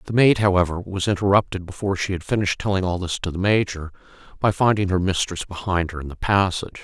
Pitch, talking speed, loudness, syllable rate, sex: 95 Hz, 210 wpm, -21 LUFS, 6.6 syllables/s, male